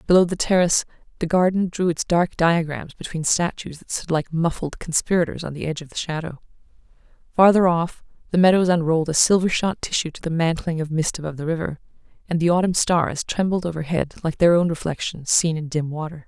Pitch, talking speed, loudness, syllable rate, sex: 165 Hz, 195 wpm, -21 LUFS, 5.9 syllables/s, female